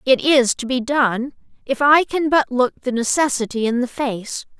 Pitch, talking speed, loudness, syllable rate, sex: 260 Hz, 195 wpm, -18 LUFS, 4.5 syllables/s, female